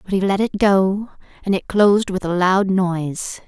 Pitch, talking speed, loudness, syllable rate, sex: 190 Hz, 205 wpm, -18 LUFS, 4.7 syllables/s, female